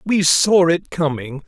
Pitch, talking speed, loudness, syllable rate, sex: 165 Hz, 165 wpm, -16 LUFS, 3.7 syllables/s, male